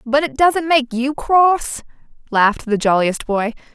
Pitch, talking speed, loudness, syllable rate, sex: 260 Hz, 160 wpm, -17 LUFS, 4.0 syllables/s, female